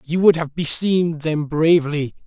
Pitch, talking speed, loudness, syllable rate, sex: 155 Hz, 160 wpm, -18 LUFS, 4.8 syllables/s, male